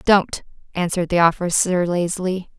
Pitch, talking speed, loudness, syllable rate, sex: 180 Hz, 115 wpm, -19 LUFS, 5.1 syllables/s, female